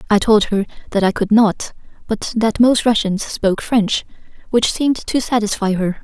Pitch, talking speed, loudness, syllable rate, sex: 215 Hz, 180 wpm, -17 LUFS, 4.8 syllables/s, female